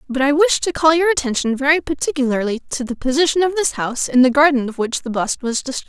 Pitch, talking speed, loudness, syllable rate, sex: 280 Hz, 245 wpm, -17 LUFS, 6.5 syllables/s, female